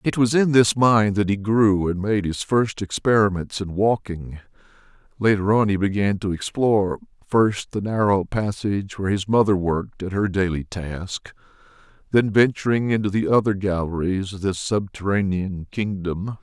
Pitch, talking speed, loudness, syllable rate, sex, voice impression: 100 Hz, 155 wpm, -21 LUFS, 4.7 syllables/s, male, masculine, very adult-like, slightly thick, slightly muffled, cool, calm, wild